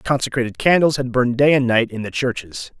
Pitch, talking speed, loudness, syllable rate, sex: 125 Hz, 215 wpm, -18 LUFS, 6.0 syllables/s, male